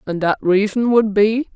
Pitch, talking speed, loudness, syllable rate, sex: 210 Hz, 190 wpm, -16 LUFS, 4.6 syllables/s, female